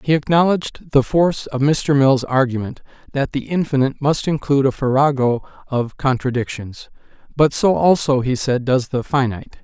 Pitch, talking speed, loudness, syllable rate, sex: 140 Hz, 155 wpm, -18 LUFS, 5.2 syllables/s, male